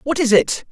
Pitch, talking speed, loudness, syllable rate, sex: 265 Hz, 255 wpm, -16 LUFS, 5.1 syllables/s, female